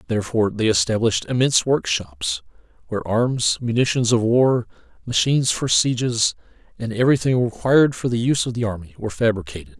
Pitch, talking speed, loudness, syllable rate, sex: 115 Hz, 145 wpm, -20 LUFS, 6.1 syllables/s, male